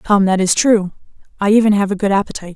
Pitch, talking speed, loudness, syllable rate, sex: 200 Hz, 235 wpm, -15 LUFS, 6.9 syllables/s, female